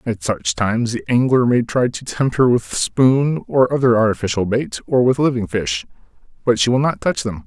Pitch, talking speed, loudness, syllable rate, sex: 115 Hz, 210 wpm, -17 LUFS, 4.8 syllables/s, male